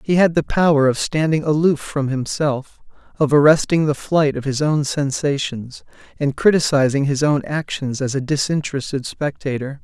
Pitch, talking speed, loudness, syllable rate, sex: 145 Hz, 160 wpm, -18 LUFS, 4.9 syllables/s, male